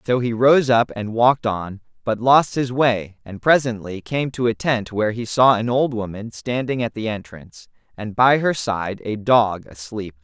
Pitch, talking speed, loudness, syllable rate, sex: 115 Hz, 200 wpm, -19 LUFS, 4.5 syllables/s, male